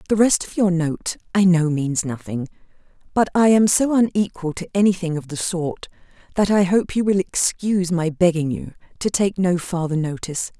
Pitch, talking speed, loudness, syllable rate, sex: 175 Hz, 185 wpm, -20 LUFS, 5.1 syllables/s, female